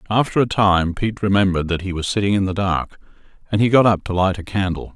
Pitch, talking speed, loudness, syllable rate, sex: 100 Hz, 240 wpm, -19 LUFS, 6.4 syllables/s, male